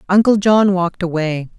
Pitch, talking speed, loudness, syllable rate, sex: 185 Hz, 150 wpm, -15 LUFS, 5.2 syllables/s, female